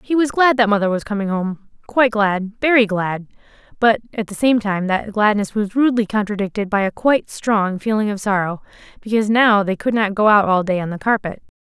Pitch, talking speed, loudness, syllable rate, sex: 210 Hz, 205 wpm, -18 LUFS, 5.7 syllables/s, female